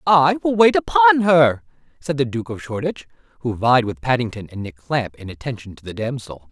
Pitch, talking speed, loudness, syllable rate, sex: 130 Hz, 205 wpm, -19 LUFS, 5.6 syllables/s, male